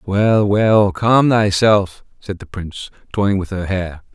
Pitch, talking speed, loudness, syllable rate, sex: 100 Hz, 160 wpm, -16 LUFS, 3.6 syllables/s, male